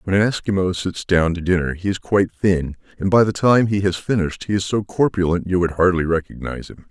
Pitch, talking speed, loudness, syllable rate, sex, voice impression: 95 Hz, 235 wpm, -19 LUFS, 5.9 syllables/s, male, masculine, middle-aged, thick, tensed, powerful, slightly hard, muffled, slightly raspy, cool, intellectual, sincere, mature, slightly friendly, wild, lively, slightly strict